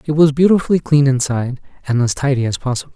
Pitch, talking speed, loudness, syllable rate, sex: 140 Hz, 205 wpm, -16 LUFS, 7.0 syllables/s, male